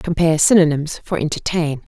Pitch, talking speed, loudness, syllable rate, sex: 160 Hz, 125 wpm, -17 LUFS, 5.5 syllables/s, female